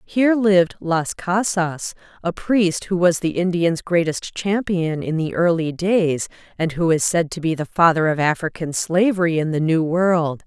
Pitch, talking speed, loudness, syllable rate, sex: 170 Hz, 180 wpm, -19 LUFS, 4.4 syllables/s, female